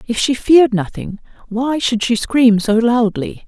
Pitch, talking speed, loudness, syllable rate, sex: 235 Hz, 175 wpm, -15 LUFS, 4.3 syllables/s, female